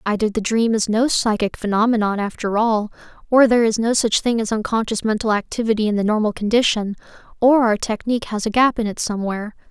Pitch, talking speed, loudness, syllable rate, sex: 220 Hz, 200 wpm, -19 LUFS, 6.1 syllables/s, female